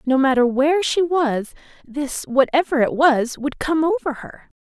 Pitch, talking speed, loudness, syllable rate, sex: 285 Hz, 170 wpm, -19 LUFS, 4.6 syllables/s, female